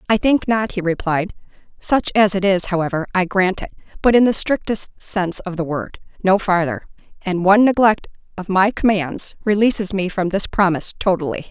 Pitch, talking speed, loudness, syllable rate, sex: 195 Hz, 170 wpm, -18 LUFS, 5.4 syllables/s, female